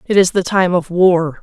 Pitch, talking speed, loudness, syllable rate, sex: 180 Hz, 255 wpm, -14 LUFS, 4.5 syllables/s, female